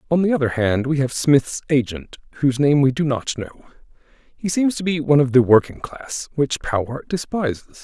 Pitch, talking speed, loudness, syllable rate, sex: 140 Hz, 200 wpm, -19 LUFS, 5.3 syllables/s, male